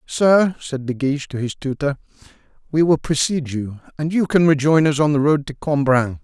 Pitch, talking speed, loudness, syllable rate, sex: 145 Hz, 200 wpm, -19 LUFS, 5.3 syllables/s, male